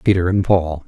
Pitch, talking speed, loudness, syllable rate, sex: 90 Hz, 205 wpm, -17 LUFS, 5.2 syllables/s, male